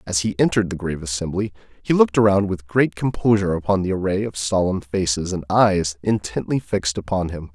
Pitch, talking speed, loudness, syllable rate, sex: 95 Hz, 190 wpm, -21 LUFS, 6.0 syllables/s, male